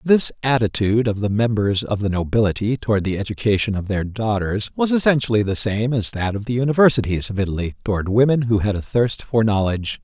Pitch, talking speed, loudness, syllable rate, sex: 110 Hz, 195 wpm, -19 LUFS, 6.0 syllables/s, male